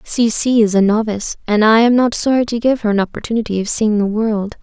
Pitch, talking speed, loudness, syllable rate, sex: 220 Hz, 245 wpm, -15 LUFS, 5.8 syllables/s, female